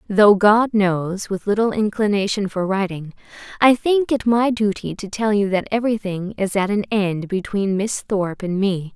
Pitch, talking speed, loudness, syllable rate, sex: 205 Hz, 180 wpm, -19 LUFS, 4.6 syllables/s, female